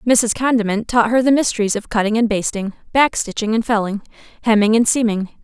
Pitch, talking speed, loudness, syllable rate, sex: 220 Hz, 190 wpm, -17 LUFS, 5.8 syllables/s, female